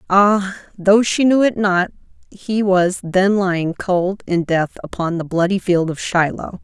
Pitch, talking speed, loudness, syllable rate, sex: 190 Hz, 170 wpm, -17 LUFS, 4.0 syllables/s, female